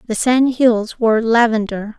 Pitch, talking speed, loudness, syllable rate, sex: 230 Hz, 150 wpm, -15 LUFS, 4.4 syllables/s, female